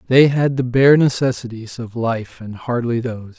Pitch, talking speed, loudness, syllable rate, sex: 120 Hz, 175 wpm, -17 LUFS, 4.7 syllables/s, male